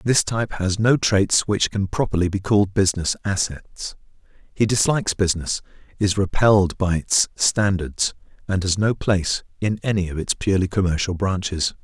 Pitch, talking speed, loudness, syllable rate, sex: 100 Hz, 155 wpm, -21 LUFS, 5.1 syllables/s, male